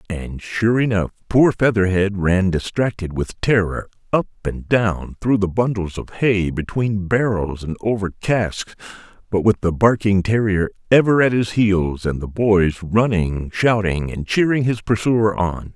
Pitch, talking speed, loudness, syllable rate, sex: 100 Hz, 155 wpm, -19 LUFS, 4.1 syllables/s, male